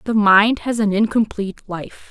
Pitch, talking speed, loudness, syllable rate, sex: 210 Hz, 170 wpm, -17 LUFS, 4.6 syllables/s, female